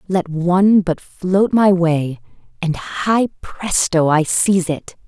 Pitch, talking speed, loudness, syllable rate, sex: 180 Hz, 140 wpm, -17 LUFS, 3.5 syllables/s, female